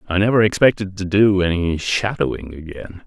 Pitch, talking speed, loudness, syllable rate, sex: 95 Hz, 155 wpm, -18 LUFS, 5.2 syllables/s, male